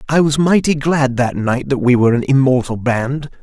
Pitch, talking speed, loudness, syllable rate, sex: 135 Hz, 210 wpm, -15 LUFS, 5.1 syllables/s, male